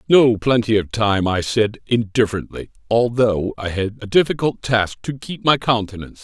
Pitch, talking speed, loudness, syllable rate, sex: 115 Hz, 165 wpm, -19 LUFS, 4.9 syllables/s, male